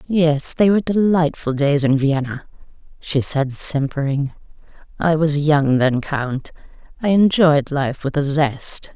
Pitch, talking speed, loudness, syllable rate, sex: 150 Hz, 140 wpm, -18 LUFS, 3.9 syllables/s, female